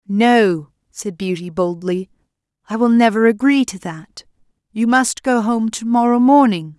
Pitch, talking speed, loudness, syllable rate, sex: 210 Hz, 150 wpm, -16 LUFS, 4.3 syllables/s, female